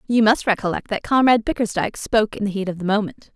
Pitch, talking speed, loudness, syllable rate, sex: 215 Hz, 235 wpm, -20 LUFS, 6.9 syllables/s, female